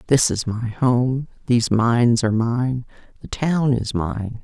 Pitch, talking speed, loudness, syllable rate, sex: 125 Hz, 160 wpm, -20 LUFS, 4.1 syllables/s, female